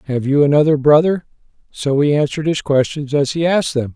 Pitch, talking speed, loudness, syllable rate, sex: 145 Hz, 195 wpm, -16 LUFS, 6.0 syllables/s, male